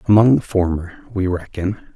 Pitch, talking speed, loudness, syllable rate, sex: 95 Hz, 155 wpm, -19 LUFS, 5.1 syllables/s, male